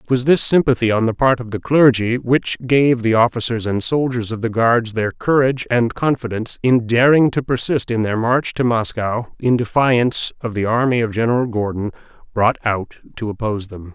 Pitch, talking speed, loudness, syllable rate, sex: 120 Hz, 195 wpm, -17 LUFS, 5.2 syllables/s, male